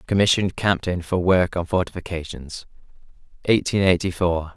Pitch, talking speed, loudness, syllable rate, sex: 90 Hz, 120 wpm, -21 LUFS, 5.2 syllables/s, male